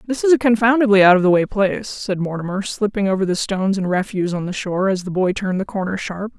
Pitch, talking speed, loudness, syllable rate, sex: 195 Hz, 255 wpm, -18 LUFS, 6.6 syllables/s, female